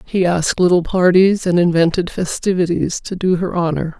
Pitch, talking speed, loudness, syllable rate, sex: 175 Hz, 165 wpm, -16 LUFS, 5.1 syllables/s, female